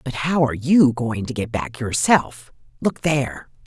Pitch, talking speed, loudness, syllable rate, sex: 130 Hz, 165 wpm, -20 LUFS, 4.5 syllables/s, female